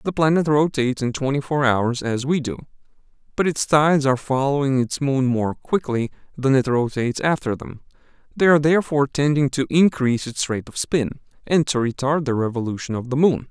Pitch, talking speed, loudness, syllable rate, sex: 135 Hz, 185 wpm, -20 LUFS, 5.7 syllables/s, male